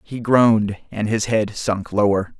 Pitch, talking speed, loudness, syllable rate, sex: 110 Hz, 175 wpm, -19 LUFS, 4.0 syllables/s, male